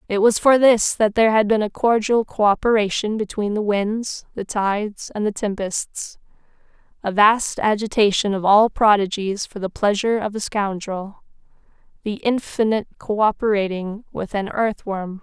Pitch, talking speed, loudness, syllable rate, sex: 210 Hz, 145 wpm, -20 LUFS, 4.8 syllables/s, female